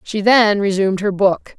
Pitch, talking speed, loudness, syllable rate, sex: 200 Hz, 190 wpm, -15 LUFS, 4.7 syllables/s, female